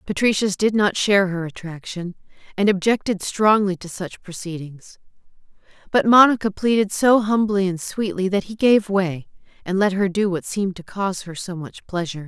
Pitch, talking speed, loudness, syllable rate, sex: 190 Hz, 170 wpm, -20 LUFS, 5.2 syllables/s, female